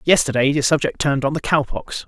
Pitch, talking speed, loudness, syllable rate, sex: 140 Hz, 230 wpm, -19 LUFS, 6.2 syllables/s, male